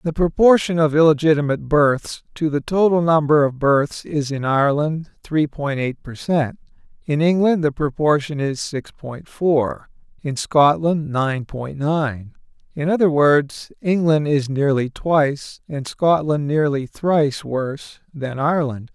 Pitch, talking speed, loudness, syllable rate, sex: 150 Hz, 145 wpm, -19 LUFS, 4.1 syllables/s, male